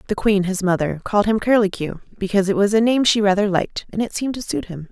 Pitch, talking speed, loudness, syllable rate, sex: 200 Hz, 255 wpm, -19 LUFS, 6.7 syllables/s, female